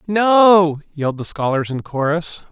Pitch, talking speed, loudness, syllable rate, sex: 165 Hz, 145 wpm, -16 LUFS, 4.1 syllables/s, male